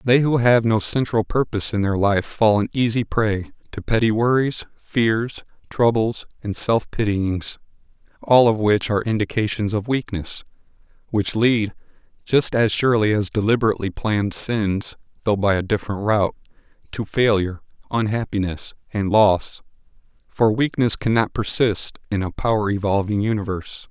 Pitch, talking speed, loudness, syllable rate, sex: 110 Hz, 140 wpm, -20 LUFS, 4.7 syllables/s, male